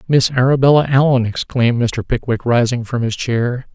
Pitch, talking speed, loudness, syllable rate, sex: 125 Hz, 160 wpm, -16 LUFS, 5.1 syllables/s, male